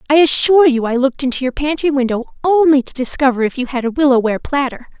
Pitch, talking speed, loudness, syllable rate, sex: 270 Hz, 230 wpm, -15 LUFS, 6.5 syllables/s, female